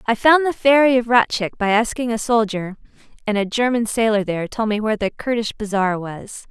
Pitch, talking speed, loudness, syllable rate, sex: 225 Hz, 205 wpm, -19 LUFS, 5.6 syllables/s, female